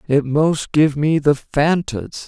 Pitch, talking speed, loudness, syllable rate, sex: 150 Hz, 185 wpm, -17 LUFS, 3.3 syllables/s, male